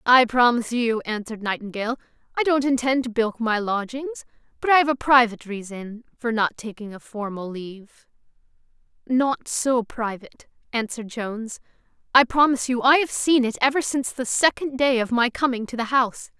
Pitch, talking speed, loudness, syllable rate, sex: 240 Hz, 170 wpm, -22 LUFS, 5.5 syllables/s, female